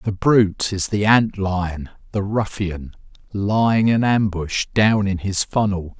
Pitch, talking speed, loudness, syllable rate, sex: 100 Hz, 150 wpm, -19 LUFS, 3.8 syllables/s, male